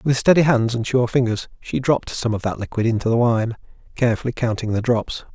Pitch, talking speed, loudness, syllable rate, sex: 120 Hz, 215 wpm, -20 LUFS, 6.0 syllables/s, male